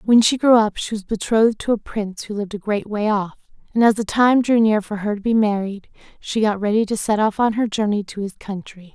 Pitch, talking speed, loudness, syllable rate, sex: 210 Hz, 260 wpm, -19 LUFS, 5.8 syllables/s, female